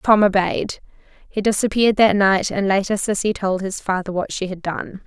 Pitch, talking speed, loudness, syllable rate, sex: 195 Hz, 190 wpm, -19 LUFS, 5.1 syllables/s, female